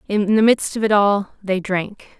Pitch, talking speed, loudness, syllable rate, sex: 205 Hz, 220 wpm, -18 LUFS, 4.2 syllables/s, female